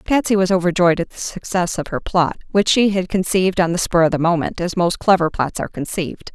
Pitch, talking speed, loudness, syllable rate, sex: 180 Hz, 235 wpm, -18 LUFS, 5.9 syllables/s, female